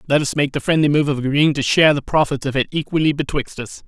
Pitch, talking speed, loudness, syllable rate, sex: 145 Hz, 265 wpm, -18 LUFS, 6.6 syllables/s, male